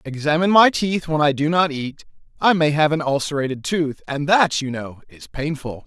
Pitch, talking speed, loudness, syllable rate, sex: 150 Hz, 205 wpm, -19 LUFS, 5.1 syllables/s, male